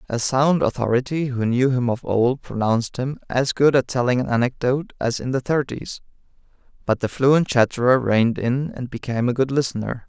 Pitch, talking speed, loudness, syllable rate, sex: 125 Hz, 185 wpm, -21 LUFS, 5.4 syllables/s, male